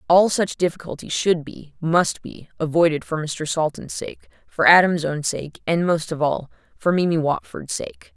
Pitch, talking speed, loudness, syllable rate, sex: 160 Hz, 160 wpm, -21 LUFS, 4.5 syllables/s, female